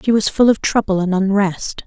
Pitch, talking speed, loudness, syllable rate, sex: 200 Hz, 225 wpm, -16 LUFS, 5.1 syllables/s, female